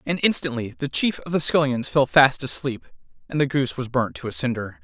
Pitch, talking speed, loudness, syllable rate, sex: 140 Hz, 225 wpm, -22 LUFS, 5.6 syllables/s, male